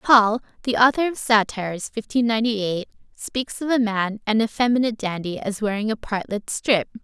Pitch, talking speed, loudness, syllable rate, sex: 220 Hz, 170 wpm, -22 LUFS, 5.3 syllables/s, female